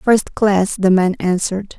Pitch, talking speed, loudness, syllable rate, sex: 200 Hz, 135 wpm, -16 LUFS, 4.1 syllables/s, female